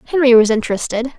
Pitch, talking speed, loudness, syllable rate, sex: 240 Hz, 150 wpm, -14 LUFS, 7.0 syllables/s, female